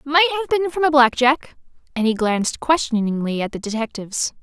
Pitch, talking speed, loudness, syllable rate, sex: 265 Hz, 190 wpm, -19 LUFS, 5.9 syllables/s, female